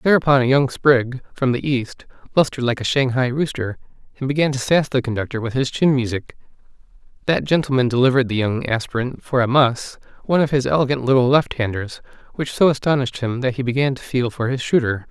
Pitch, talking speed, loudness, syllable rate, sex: 130 Hz, 200 wpm, -19 LUFS, 6.1 syllables/s, male